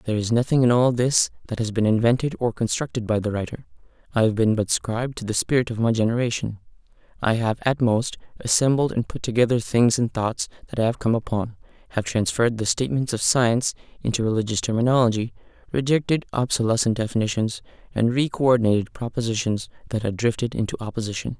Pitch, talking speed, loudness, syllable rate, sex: 115 Hz, 175 wpm, -23 LUFS, 6.2 syllables/s, male